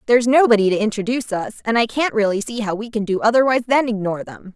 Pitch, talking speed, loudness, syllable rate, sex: 220 Hz, 235 wpm, -18 LUFS, 7.1 syllables/s, female